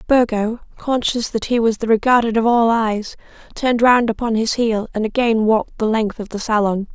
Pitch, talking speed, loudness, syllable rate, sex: 225 Hz, 200 wpm, -18 LUFS, 5.3 syllables/s, female